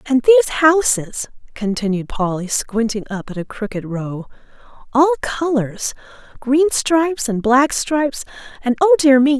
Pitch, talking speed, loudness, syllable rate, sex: 255 Hz, 130 wpm, -17 LUFS, 4.5 syllables/s, female